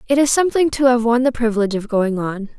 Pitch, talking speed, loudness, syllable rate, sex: 240 Hz, 255 wpm, -17 LUFS, 6.7 syllables/s, female